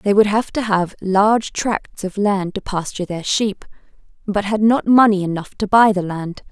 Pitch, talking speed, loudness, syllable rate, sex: 200 Hz, 205 wpm, -18 LUFS, 4.6 syllables/s, female